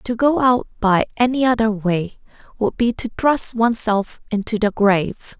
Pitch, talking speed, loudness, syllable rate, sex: 220 Hz, 165 wpm, -18 LUFS, 4.6 syllables/s, female